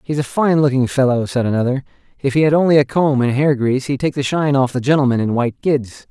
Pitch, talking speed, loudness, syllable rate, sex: 135 Hz, 255 wpm, -16 LUFS, 6.4 syllables/s, male